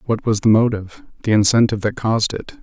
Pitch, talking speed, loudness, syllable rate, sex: 110 Hz, 205 wpm, -17 LUFS, 6.8 syllables/s, male